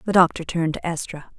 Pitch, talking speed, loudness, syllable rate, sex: 170 Hz, 215 wpm, -22 LUFS, 6.6 syllables/s, female